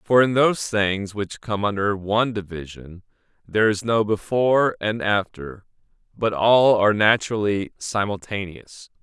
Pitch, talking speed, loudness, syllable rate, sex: 105 Hz, 135 wpm, -21 LUFS, 4.6 syllables/s, male